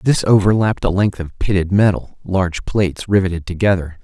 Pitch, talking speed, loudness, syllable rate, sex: 95 Hz, 165 wpm, -17 LUFS, 5.6 syllables/s, male